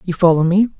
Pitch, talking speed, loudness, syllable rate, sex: 180 Hz, 225 wpm, -14 LUFS, 6.6 syllables/s, female